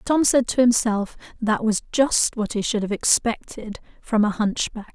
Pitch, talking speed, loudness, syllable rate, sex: 225 Hz, 195 wpm, -21 LUFS, 4.6 syllables/s, female